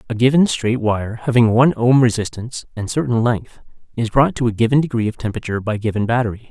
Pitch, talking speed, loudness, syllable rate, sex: 115 Hz, 205 wpm, -17 LUFS, 6.4 syllables/s, male